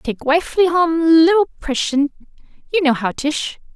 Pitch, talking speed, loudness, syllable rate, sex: 310 Hz, 130 wpm, -17 LUFS, 4.3 syllables/s, female